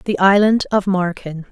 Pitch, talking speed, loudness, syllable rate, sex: 190 Hz, 160 wpm, -16 LUFS, 4.6 syllables/s, female